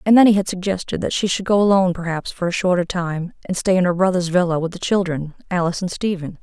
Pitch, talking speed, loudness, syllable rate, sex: 180 Hz, 250 wpm, -19 LUFS, 6.5 syllables/s, female